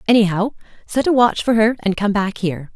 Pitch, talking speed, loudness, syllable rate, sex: 210 Hz, 220 wpm, -18 LUFS, 5.9 syllables/s, female